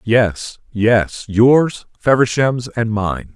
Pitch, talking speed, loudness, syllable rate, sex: 115 Hz, 90 wpm, -16 LUFS, 2.7 syllables/s, male